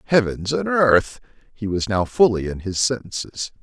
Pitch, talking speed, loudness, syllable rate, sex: 110 Hz, 165 wpm, -20 LUFS, 4.3 syllables/s, male